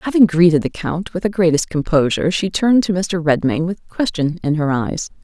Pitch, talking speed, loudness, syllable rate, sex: 170 Hz, 205 wpm, -17 LUFS, 5.4 syllables/s, female